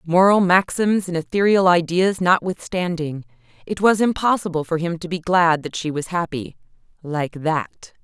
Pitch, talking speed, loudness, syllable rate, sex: 175 Hz, 140 wpm, -19 LUFS, 4.6 syllables/s, female